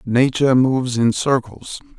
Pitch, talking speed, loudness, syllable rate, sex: 125 Hz, 120 wpm, -17 LUFS, 4.7 syllables/s, male